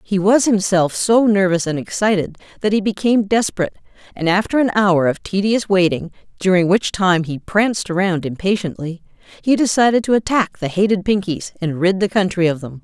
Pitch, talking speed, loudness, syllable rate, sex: 190 Hz, 180 wpm, -17 LUFS, 5.5 syllables/s, female